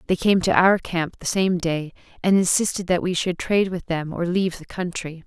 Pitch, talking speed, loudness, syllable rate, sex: 180 Hz, 230 wpm, -22 LUFS, 5.3 syllables/s, female